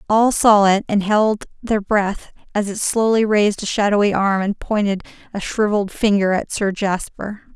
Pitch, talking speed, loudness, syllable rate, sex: 205 Hz, 175 wpm, -18 LUFS, 4.7 syllables/s, female